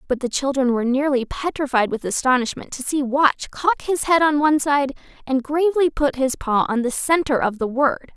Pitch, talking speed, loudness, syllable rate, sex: 275 Hz, 205 wpm, -20 LUFS, 5.3 syllables/s, female